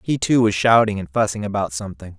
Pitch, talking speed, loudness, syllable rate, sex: 105 Hz, 220 wpm, -19 LUFS, 6.3 syllables/s, male